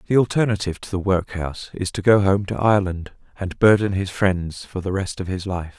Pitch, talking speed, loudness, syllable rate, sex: 95 Hz, 220 wpm, -21 LUFS, 5.7 syllables/s, male